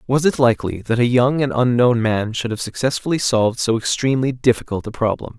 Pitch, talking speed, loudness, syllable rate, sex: 120 Hz, 200 wpm, -18 LUFS, 5.9 syllables/s, male